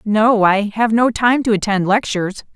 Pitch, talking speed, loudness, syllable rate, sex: 215 Hz, 190 wpm, -16 LUFS, 4.6 syllables/s, female